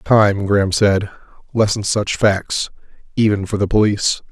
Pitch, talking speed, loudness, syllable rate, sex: 100 Hz, 125 wpm, -17 LUFS, 4.5 syllables/s, male